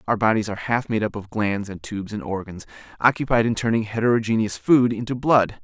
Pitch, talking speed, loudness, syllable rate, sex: 110 Hz, 200 wpm, -22 LUFS, 6.0 syllables/s, male